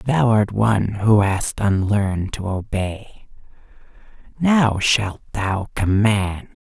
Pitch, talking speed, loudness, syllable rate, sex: 105 Hz, 110 wpm, -19 LUFS, 3.4 syllables/s, male